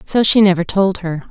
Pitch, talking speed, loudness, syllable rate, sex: 185 Hz, 230 wpm, -14 LUFS, 5.0 syllables/s, female